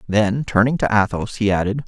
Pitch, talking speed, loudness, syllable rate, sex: 105 Hz, 190 wpm, -19 LUFS, 5.3 syllables/s, male